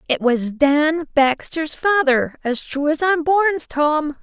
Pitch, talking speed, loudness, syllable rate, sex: 300 Hz, 155 wpm, -18 LUFS, 3.6 syllables/s, female